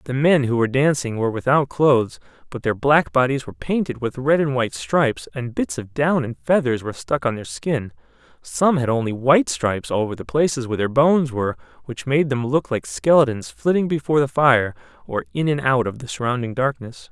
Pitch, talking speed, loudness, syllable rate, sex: 130 Hz, 210 wpm, -20 LUFS, 5.7 syllables/s, male